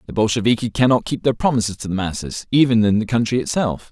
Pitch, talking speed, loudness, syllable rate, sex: 115 Hz, 215 wpm, -19 LUFS, 6.5 syllables/s, male